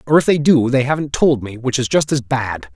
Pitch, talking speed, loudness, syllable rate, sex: 130 Hz, 285 wpm, -17 LUFS, 5.5 syllables/s, male